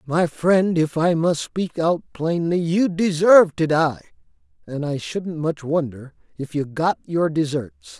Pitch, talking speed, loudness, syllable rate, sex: 160 Hz, 160 wpm, -20 LUFS, 4.1 syllables/s, male